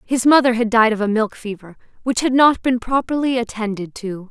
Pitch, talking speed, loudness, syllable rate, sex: 235 Hz, 210 wpm, -18 LUFS, 5.3 syllables/s, female